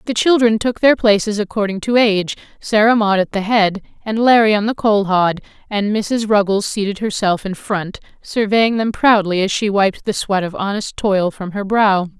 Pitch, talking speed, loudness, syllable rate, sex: 205 Hz, 195 wpm, -16 LUFS, 4.8 syllables/s, female